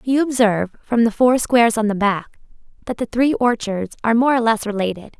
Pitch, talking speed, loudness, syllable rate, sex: 230 Hz, 210 wpm, -18 LUFS, 5.5 syllables/s, female